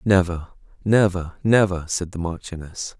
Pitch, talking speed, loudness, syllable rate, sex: 90 Hz, 120 wpm, -22 LUFS, 4.5 syllables/s, male